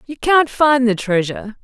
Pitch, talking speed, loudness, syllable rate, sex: 250 Hz, 185 wpm, -16 LUFS, 4.7 syllables/s, female